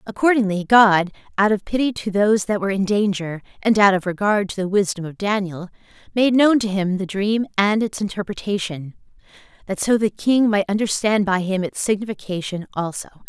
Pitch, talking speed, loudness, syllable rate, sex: 200 Hz, 180 wpm, -20 LUFS, 5.5 syllables/s, female